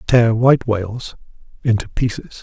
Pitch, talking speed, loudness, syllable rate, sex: 115 Hz, 125 wpm, -18 LUFS, 5.0 syllables/s, male